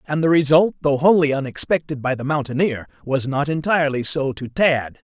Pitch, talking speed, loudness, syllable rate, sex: 145 Hz, 175 wpm, -19 LUFS, 5.4 syllables/s, male